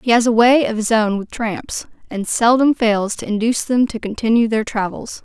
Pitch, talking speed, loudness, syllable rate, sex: 225 Hz, 220 wpm, -17 LUFS, 5.1 syllables/s, female